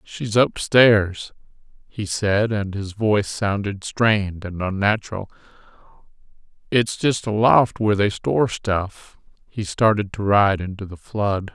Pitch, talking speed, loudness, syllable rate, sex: 105 Hz, 135 wpm, -20 LUFS, 4.0 syllables/s, male